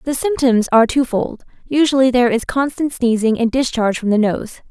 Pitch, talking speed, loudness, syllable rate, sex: 245 Hz, 180 wpm, -16 LUFS, 5.7 syllables/s, female